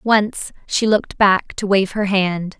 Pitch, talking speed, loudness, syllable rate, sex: 200 Hz, 185 wpm, -18 LUFS, 3.7 syllables/s, female